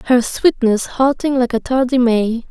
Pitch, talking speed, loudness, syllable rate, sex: 245 Hz, 170 wpm, -16 LUFS, 4.4 syllables/s, female